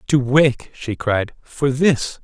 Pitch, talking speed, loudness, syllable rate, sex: 130 Hz, 160 wpm, -18 LUFS, 3.0 syllables/s, male